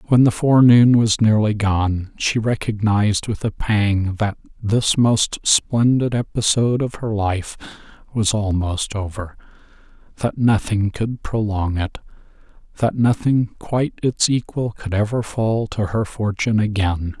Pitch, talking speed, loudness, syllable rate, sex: 110 Hz, 135 wpm, -19 LUFS, 4.2 syllables/s, male